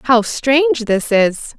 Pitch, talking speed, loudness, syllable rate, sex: 245 Hz, 150 wpm, -15 LUFS, 3.3 syllables/s, female